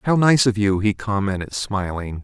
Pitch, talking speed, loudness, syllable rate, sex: 100 Hz, 190 wpm, -20 LUFS, 4.8 syllables/s, male